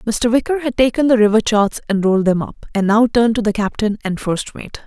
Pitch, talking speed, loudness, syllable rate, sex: 220 Hz, 245 wpm, -16 LUFS, 5.7 syllables/s, female